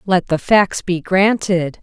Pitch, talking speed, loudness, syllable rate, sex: 185 Hz, 165 wpm, -16 LUFS, 3.6 syllables/s, female